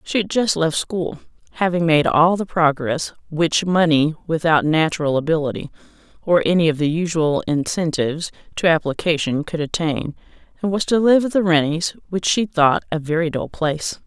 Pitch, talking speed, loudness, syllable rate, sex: 165 Hz, 165 wpm, -19 LUFS, 5.1 syllables/s, female